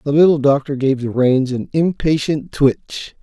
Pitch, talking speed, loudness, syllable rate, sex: 140 Hz, 165 wpm, -16 LUFS, 4.3 syllables/s, male